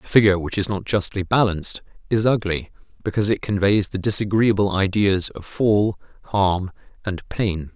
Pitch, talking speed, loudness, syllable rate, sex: 100 Hz, 155 wpm, -21 LUFS, 5.2 syllables/s, male